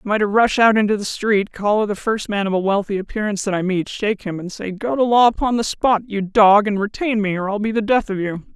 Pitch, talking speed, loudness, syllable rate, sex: 210 Hz, 290 wpm, -18 LUFS, 6.0 syllables/s, female